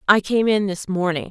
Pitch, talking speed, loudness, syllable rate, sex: 195 Hz, 230 wpm, -20 LUFS, 5.2 syllables/s, female